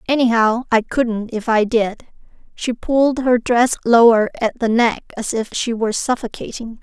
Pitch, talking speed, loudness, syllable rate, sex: 235 Hz, 165 wpm, -17 LUFS, 4.6 syllables/s, female